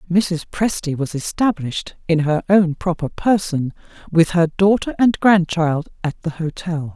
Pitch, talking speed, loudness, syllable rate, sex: 170 Hz, 145 wpm, -19 LUFS, 4.3 syllables/s, female